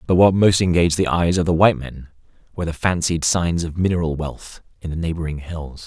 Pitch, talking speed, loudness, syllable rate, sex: 85 Hz, 215 wpm, -19 LUFS, 5.9 syllables/s, male